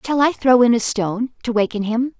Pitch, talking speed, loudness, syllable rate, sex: 235 Hz, 245 wpm, -18 LUFS, 5.6 syllables/s, female